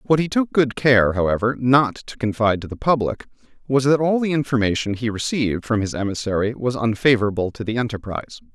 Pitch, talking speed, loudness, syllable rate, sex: 120 Hz, 190 wpm, -20 LUFS, 5.9 syllables/s, male